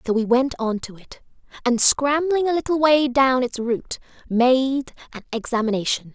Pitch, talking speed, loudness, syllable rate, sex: 255 Hz, 165 wpm, -20 LUFS, 4.6 syllables/s, female